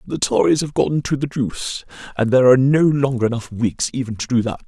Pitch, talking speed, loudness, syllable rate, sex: 125 Hz, 230 wpm, -18 LUFS, 6.1 syllables/s, male